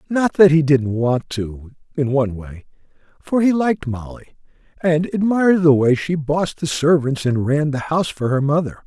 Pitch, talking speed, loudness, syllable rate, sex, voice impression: 150 Hz, 190 wpm, -18 LUFS, 5.0 syllables/s, male, very masculine, old, very thick, slightly relaxed, slightly powerful, slightly dark, slightly soft, muffled, slightly halting, slightly raspy, slightly cool, intellectual, very sincere, very calm, very mature, friendly, very reassuring, very unique, slightly elegant, wild, slightly sweet, slightly lively, kind, modest